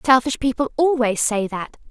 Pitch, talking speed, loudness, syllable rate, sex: 250 Hz, 155 wpm, -20 LUFS, 5.0 syllables/s, female